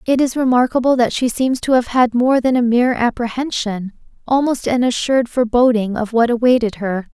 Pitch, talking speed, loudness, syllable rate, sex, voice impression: 240 Hz, 185 wpm, -16 LUFS, 5.6 syllables/s, female, very feminine, young, slightly tensed, slightly bright, cute, refreshing, slightly friendly